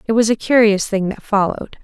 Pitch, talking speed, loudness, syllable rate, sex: 210 Hz, 230 wpm, -16 LUFS, 5.9 syllables/s, female